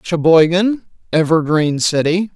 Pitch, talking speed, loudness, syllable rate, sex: 170 Hz, 75 wpm, -15 LUFS, 4.0 syllables/s, male